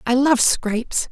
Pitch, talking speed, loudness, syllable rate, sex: 250 Hz, 160 wpm, -18 LUFS, 4.0 syllables/s, female